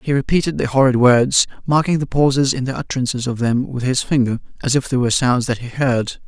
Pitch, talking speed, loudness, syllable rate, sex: 130 Hz, 220 wpm, -17 LUFS, 5.9 syllables/s, male